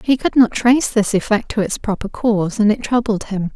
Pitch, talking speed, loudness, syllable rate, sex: 220 Hz, 235 wpm, -17 LUFS, 5.5 syllables/s, female